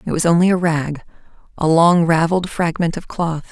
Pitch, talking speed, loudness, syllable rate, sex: 165 Hz, 190 wpm, -17 LUFS, 5.3 syllables/s, female